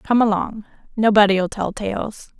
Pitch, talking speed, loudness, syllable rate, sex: 210 Hz, 125 wpm, -19 LUFS, 4.1 syllables/s, female